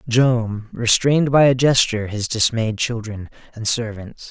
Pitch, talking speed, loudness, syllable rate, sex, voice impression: 115 Hz, 140 wpm, -18 LUFS, 4.4 syllables/s, male, masculine, adult-like, relaxed, weak, slightly dark, slightly halting, raspy, slightly friendly, unique, wild, lively, slightly strict, slightly intense